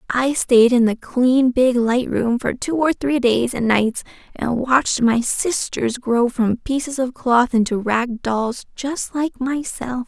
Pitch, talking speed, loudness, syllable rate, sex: 250 Hz, 180 wpm, -19 LUFS, 3.7 syllables/s, female